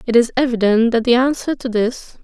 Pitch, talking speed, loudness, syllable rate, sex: 240 Hz, 215 wpm, -16 LUFS, 5.4 syllables/s, female